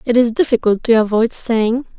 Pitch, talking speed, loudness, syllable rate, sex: 230 Hz, 180 wpm, -15 LUFS, 5.0 syllables/s, female